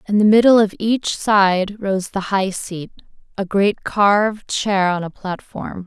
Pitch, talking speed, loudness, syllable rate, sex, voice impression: 200 Hz, 175 wpm, -17 LUFS, 3.8 syllables/s, female, feminine, slightly adult-like, slightly soft, slightly sincere, slightly calm, slightly kind